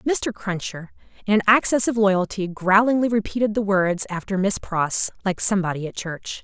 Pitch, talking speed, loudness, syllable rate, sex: 200 Hz, 170 wpm, -21 LUFS, 5.0 syllables/s, female